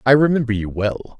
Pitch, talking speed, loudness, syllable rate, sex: 120 Hz, 200 wpm, -19 LUFS, 5.6 syllables/s, male